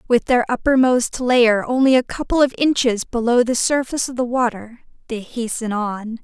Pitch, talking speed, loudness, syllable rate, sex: 240 Hz, 175 wpm, -18 LUFS, 4.9 syllables/s, female